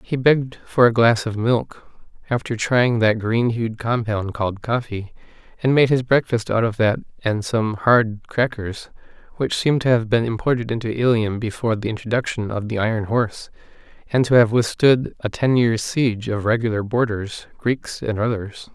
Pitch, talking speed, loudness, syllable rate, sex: 115 Hz, 175 wpm, -20 LUFS, 4.9 syllables/s, male